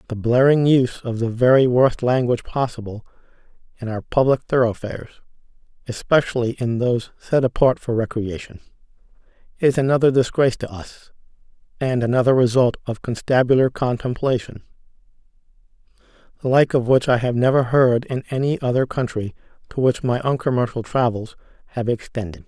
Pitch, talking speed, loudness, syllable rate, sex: 125 Hz, 130 wpm, -19 LUFS, 5.6 syllables/s, male